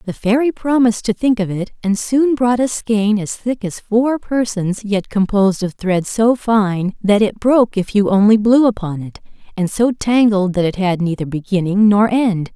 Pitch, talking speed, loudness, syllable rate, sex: 210 Hz, 200 wpm, -16 LUFS, 4.6 syllables/s, female